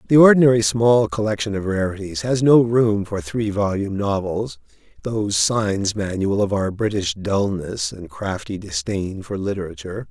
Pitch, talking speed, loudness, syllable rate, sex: 100 Hz, 150 wpm, -20 LUFS, 4.8 syllables/s, male